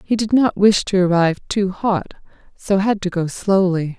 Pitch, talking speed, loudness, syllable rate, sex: 190 Hz, 195 wpm, -18 LUFS, 4.6 syllables/s, female